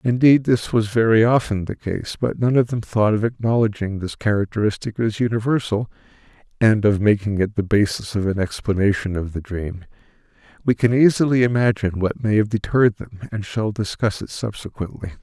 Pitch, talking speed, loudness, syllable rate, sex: 110 Hz, 175 wpm, -20 LUFS, 5.5 syllables/s, male